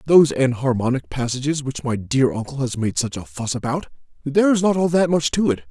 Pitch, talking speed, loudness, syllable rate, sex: 135 Hz, 210 wpm, -20 LUFS, 5.7 syllables/s, male